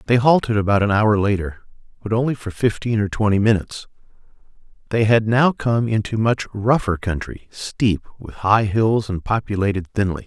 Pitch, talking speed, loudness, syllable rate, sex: 105 Hz, 165 wpm, -19 LUFS, 5.1 syllables/s, male